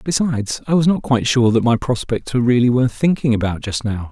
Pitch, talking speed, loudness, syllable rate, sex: 125 Hz, 235 wpm, -17 LUFS, 6.1 syllables/s, male